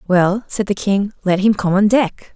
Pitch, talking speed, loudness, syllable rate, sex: 200 Hz, 230 wpm, -16 LUFS, 4.4 syllables/s, female